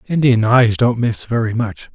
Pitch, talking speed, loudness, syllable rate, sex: 115 Hz, 185 wpm, -16 LUFS, 4.4 syllables/s, male